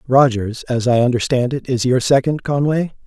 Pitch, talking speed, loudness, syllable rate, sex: 130 Hz, 175 wpm, -17 LUFS, 5.0 syllables/s, male